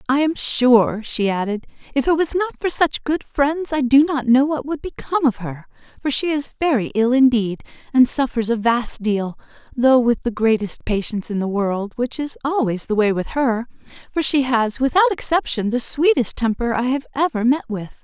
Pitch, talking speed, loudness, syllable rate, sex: 255 Hz, 205 wpm, -19 LUFS, 4.9 syllables/s, female